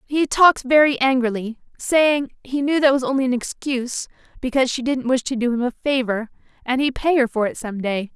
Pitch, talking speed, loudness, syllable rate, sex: 260 Hz, 215 wpm, -20 LUFS, 5.5 syllables/s, female